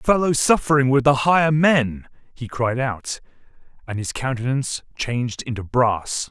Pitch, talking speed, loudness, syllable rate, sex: 130 Hz, 145 wpm, -20 LUFS, 4.6 syllables/s, male